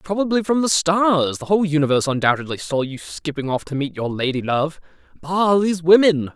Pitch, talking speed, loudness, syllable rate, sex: 160 Hz, 180 wpm, -19 LUFS, 5.7 syllables/s, male